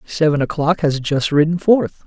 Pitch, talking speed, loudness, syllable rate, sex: 155 Hz, 175 wpm, -17 LUFS, 4.7 syllables/s, male